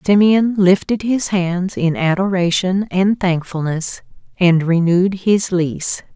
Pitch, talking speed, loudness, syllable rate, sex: 185 Hz, 115 wpm, -16 LUFS, 3.9 syllables/s, female